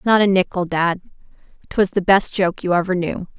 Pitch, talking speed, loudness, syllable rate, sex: 185 Hz, 195 wpm, -18 LUFS, 5.1 syllables/s, female